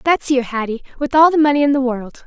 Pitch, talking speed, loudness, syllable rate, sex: 270 Hz, 265 wpm, -16 LUFS, 6.1 syllables/s, female